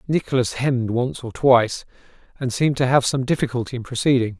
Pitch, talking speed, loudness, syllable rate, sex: 125 Hz, 175 wpm, -20 LUFS, 6.2 syllables/s, male